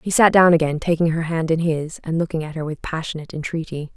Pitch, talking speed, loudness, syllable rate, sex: 160 Hz, 240 wpm, -20 LUFS, 6.3 syllables/s, female